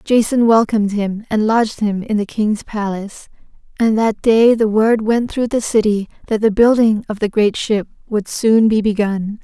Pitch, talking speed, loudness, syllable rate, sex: 215 Hz, 190 wpm, -16 LUFS, 4.7 syllables/s, female